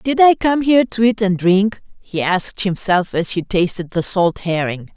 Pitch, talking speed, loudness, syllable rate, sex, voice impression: 200 Hz, 205 wpm, -17 LUFS, 4.7 syllables/s, female, feminine, middle-aged, tensed, powerful, clear, slightly friendly, lively, strict, slightly intense, sharp